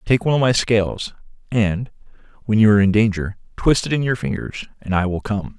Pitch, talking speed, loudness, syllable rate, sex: 105 Hz, 215 wpm, -19 LUFS, 5.8 syllables/s, male